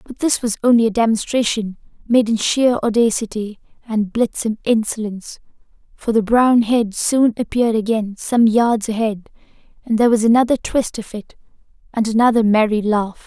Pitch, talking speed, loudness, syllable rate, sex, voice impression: 225 Hz, 155 wpm, -17 LUFS, 5.3 syllables/s, female, slightly masculine, very young, slightly soft, slightly cute, friendly, slightly kind